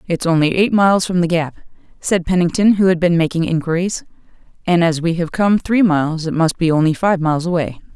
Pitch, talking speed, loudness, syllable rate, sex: 175 Hz, 210 wpm, -16 LUFS, 5.9 syllables/s, female